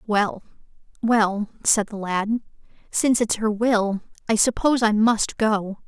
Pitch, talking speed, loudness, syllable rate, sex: 215 Hz, 145 wpm, -22 LUFS, 4.0 syllables/s, female